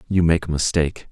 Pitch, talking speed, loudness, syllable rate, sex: 80 Hz, 215 wpm, -20 LUFS, 6.5 syllables/s, male